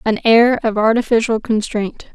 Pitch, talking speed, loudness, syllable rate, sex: 225 Hz, 140 wpm, -15 LUFS, 4.7 syllables/s, female